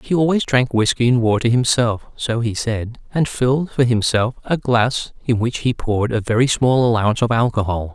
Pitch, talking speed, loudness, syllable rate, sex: 120 Hz, 190 wpm, -18 LUFS, 5.3 syllables/s, male